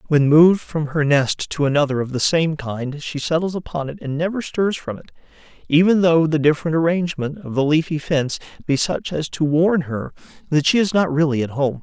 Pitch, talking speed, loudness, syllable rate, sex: 155 Hz, 215 wpm, -19 LUFS, 5.5 syllables/s, male